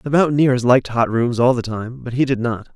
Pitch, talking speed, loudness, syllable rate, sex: 125 Hz, 260 wpm, -18 LUFS, 5.7 syllables/s, male